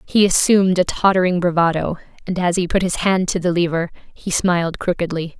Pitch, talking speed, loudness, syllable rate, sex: 175 Hz, 190 wpm, -18 LUFS, 5.6 syllables/s, female